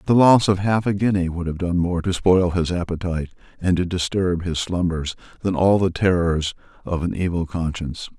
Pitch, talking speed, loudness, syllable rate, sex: 90 Hz, 200 wpm, -21 LUFS, 5.2 syllables/s, male